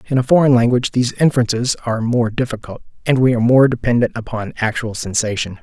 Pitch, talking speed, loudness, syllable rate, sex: 120 Hz, 180 wpm, -16 LUFS, 6.8 syllables/s, male